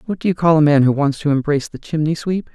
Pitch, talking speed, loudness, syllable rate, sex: 155 Hz, 305 wpm, -17 LUFS, 6.7 syllables/s, male